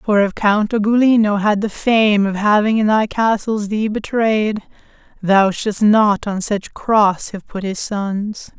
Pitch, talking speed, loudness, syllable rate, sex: 210 Hz, 170 wpm, -16 LUFS, 3.8 syllables/s, female